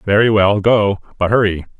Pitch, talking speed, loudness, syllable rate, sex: 105 Hz, 165 wpm, -15 LUFS, 5.0 syllables/s, male